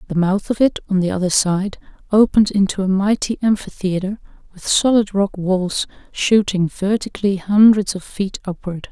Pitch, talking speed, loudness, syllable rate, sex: 195 Hz, 155 wpm, -18 LUFS, 5.0 syllables/s, female